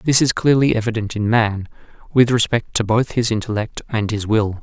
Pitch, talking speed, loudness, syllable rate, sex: 115 Hz, 195 wpm, -18 LUFS, 5.1 syllables/s, male